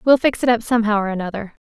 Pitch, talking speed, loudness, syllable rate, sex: 220 Hz, 245 wpm, -18 LUFS, 7.5 syllables/s, female